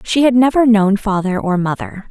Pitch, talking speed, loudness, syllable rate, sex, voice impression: 215 Hz, 200 wpm, -14 LUFS, 5.0 syllables/s, female, feminine, adult-like, slightly fluent, slightly unique, slightly intense